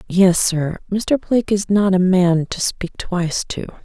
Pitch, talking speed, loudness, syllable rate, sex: 185 Hz, 190 wpm, -18 LUFS, 4.2 syllables/s, female